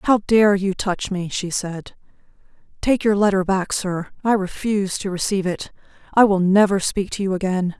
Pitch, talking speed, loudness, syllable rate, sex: 195 Hz, 185 wpm, -20 LUFS, 4.9 syllables/s, female